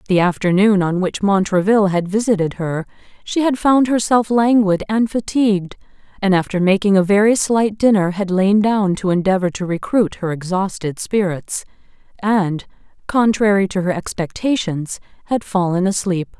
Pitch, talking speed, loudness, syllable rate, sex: 195 Hz, 145 wpm, -17 LUFS, 4.8 syllables/s, female